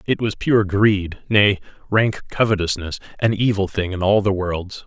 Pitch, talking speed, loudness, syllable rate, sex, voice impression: 100 Hz, 175 wpm, -19 LUFS, 4.5 syllables/s, male, masculine, very adult-like, cool, sincere, slightly mature, slightly wild, slightly sweet